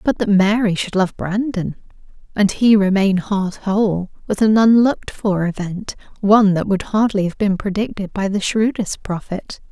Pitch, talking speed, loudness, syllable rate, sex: 200 Hz, 160 wpm, -18 LUFS, 4.7 syllables/s, female